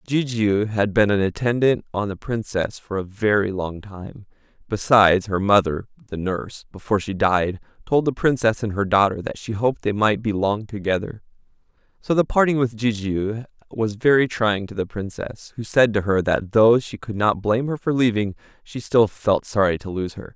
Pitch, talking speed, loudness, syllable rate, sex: 105 Hz, 195 wpm, -21 LUFS, 5.0 syllables/s, male